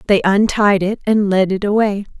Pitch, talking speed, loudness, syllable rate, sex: 200 Hz, 190 wpm, -15 LUFS, 4.9 syllables/s, female